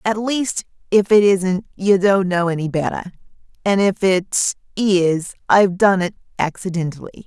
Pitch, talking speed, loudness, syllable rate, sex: 190 Hz, 150 wpm, -18 LUFS, 4.4 syllables/s, female